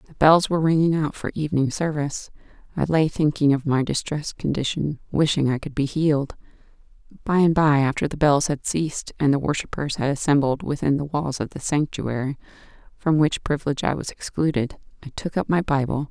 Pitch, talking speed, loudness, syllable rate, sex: 145 Hz, 185 wpm, -22 LUFS, 5.8 syllables/s, female